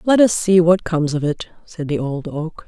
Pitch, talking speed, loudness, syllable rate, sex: 170 Hz, 245 wpm, -18 LUFS, 5.0 syllables/s, female